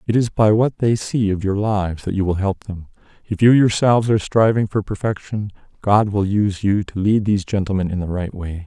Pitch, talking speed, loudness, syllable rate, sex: 100 Hz, 230 wpm, -19 LUFS, 5.6 syllables/s, male